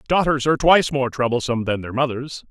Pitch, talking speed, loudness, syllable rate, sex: 130 Hz, 190 wpm, -20 LUFS, 6.4 syllables/s, male